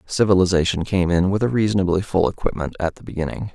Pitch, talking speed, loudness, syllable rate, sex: 95 Hz, 185 wpm, -20 LUFS, 6.5 syllables/s, male